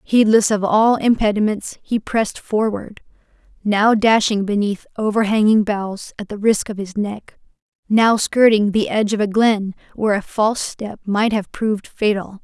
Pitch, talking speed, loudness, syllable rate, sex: 210 Hz, 150 wpm, -18 LUFS, 4.6 syllables/s, female